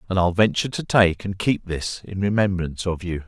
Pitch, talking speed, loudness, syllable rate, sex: 95 Hz, 220 wpm, -22 LUFS, 5.6 syllables/s, male